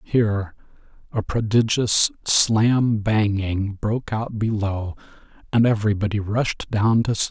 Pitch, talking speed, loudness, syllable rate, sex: 105 Hz, 115 wpm, -21 LUFS, 4.0 syllables/s, male